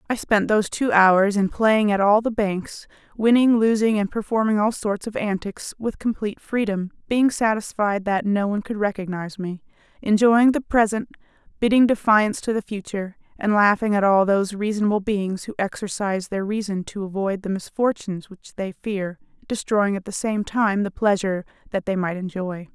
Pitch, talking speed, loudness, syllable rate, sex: 205 Hz, 175 wpm, -22 LUFS, 5.3 syllables/s, female